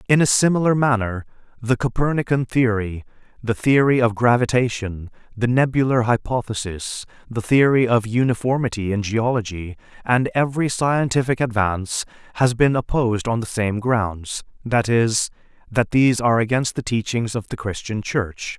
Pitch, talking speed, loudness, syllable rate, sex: 120 Hz, 140 wpm, -20 LUFS, 4.9 syllables/s, male